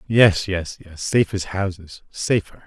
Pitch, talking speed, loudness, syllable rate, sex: 95 Hz, 135 wpm, -21 LUFS, 4.2 syllables/s, male